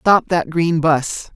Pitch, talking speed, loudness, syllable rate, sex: 165 Hz, 175 wpm, -17 LUFS, 3.1 syllables/s, male